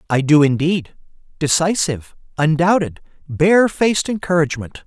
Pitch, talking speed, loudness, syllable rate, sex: 165 Hz, 85 wpm, -17 LUFS, 5.0 syllables/s, male